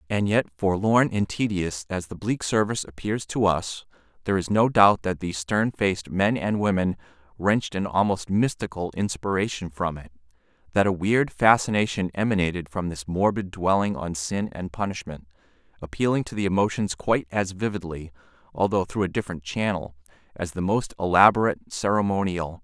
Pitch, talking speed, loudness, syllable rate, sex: 95 Hz, 155 wpm, -24 LUFS, 5.4 syllables/s, male